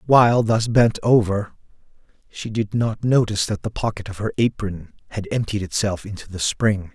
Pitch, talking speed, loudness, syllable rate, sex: 105 Hz, 175 wpm, -21 LUFS, 5.1 syllables/s, male